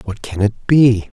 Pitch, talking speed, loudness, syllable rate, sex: 110 Hz, 205 wpm, -15 LUFS, 4.8 syllables/s, male